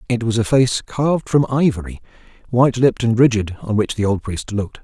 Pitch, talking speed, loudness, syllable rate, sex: 115 Hz, 210 wpm, -18 LUFS, 5.9 syllables/s, male